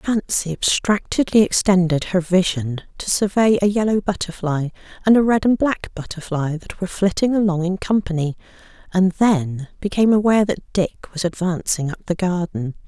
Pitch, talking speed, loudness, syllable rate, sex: 185 Hz, 155 wpm, -19 LUFS, 5.1 syllables/s, female